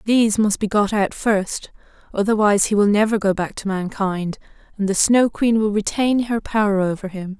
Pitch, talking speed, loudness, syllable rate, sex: 205 Hz, 195 wpm, -19 LUFS, 5.1 syllables/s, female